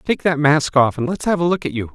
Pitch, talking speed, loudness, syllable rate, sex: 150 Hz, 340 wpm, -18 LUFS, 5.8 syllables/s, male